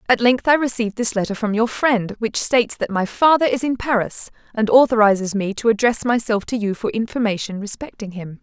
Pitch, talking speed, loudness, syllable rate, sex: 225 Hz, 205 wpm, -19 LUFS, 5.6 syllables/s, female